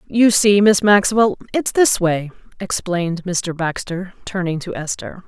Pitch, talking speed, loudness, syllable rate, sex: 185 Hz, 150 wpm, -17 LUFS, 4.2 syllables/s, female